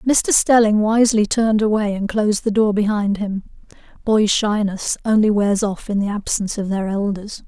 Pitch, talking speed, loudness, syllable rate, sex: 210 Hz, 175 wpm, -18 LUFS, 5.1 syllables/s, female